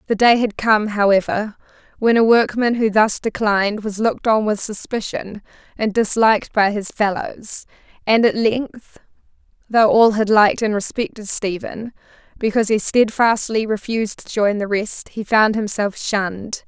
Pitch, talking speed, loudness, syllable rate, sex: 215 Hz, 150 wpm, -18 LUFS, 4.7 syllables/s, female